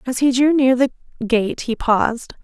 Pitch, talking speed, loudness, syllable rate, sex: 250 Hz, 195 wpm, -18 LUFS, 4.7 syllables/s, female